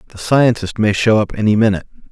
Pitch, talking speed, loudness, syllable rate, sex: 105 Hz, 200 wpm, -15 LUFS, 6.7 syllables/s, male